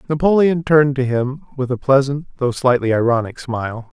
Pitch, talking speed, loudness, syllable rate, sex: 135 Hz, 165 wpm, -17 LUFS, 5.4 syllables/s, male